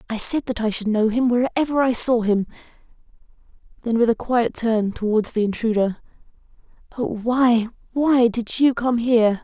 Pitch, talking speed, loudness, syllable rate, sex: 235 Hz, 165 wpm, -20 LUFS, 4.8 syllables/s, female